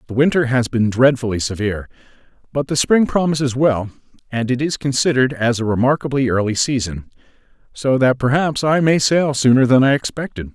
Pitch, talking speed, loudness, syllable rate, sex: 130 Hz, 170 wpm, -17 LUFS, 5.6 syllables/s, male